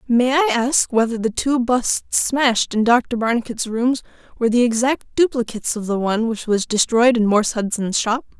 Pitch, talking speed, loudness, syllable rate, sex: 235 Hz, 185 wpm, -18 LUFS, 5.1 syllables/s, female